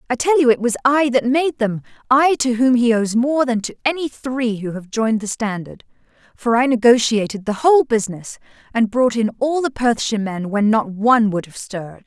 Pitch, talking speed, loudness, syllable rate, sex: 235 Hz, 210 wpm, -18 LUFS, 5.3 syllables/s, female